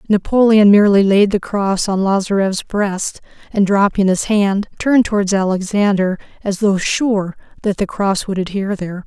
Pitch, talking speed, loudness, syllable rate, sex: 200 Hz, 160 wpm, -16 LUFS, 4.9 syllables/s, female